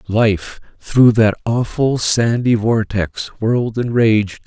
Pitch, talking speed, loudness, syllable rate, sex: 110 Hz, 120 wpm, -16 LUFS, 3.3 syllables/s, male